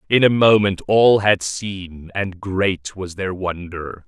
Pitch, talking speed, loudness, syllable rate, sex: 95 Hz, 160 wpm, -18 LUFS, 3.5 syllables/s, male